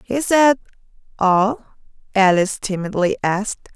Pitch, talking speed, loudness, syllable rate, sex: 215 Hz, 95 wpm, -18 LUFS, 4.6 syllables/s, female